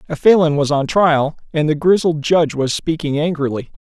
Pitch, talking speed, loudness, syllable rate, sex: 155 Hz, 185 wpm, -16 LUFS, 5.4 syllables/s, male